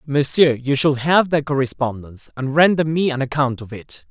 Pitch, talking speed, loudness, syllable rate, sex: 140 Hz, 190 wpm, -18 LUFS, 5.1 syllables/s, male